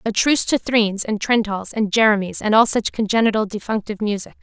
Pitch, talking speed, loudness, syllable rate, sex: 215 Hz, 190 wpm, -19 LUFS, 6.2 syllables/s, female